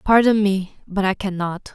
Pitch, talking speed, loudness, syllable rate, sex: 195 Hz, 170 wpm, -20 LUFS, 4.4 syllables/s, female